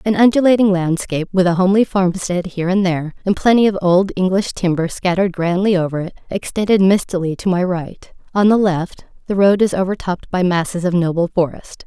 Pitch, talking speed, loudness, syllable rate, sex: 185 Hz, 185 wpm, -16 LUFS, 5.8 syllables/s, female